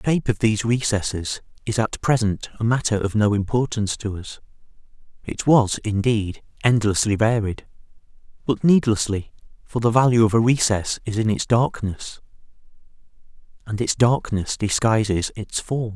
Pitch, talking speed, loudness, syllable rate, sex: 110 Hz, 145 wpm, -21 LUFS, 5.0 syllables/s, male